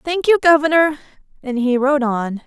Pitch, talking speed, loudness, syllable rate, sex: 285 Hz, 170 wpm, -16 LUFS, 4.8 syllables/s, female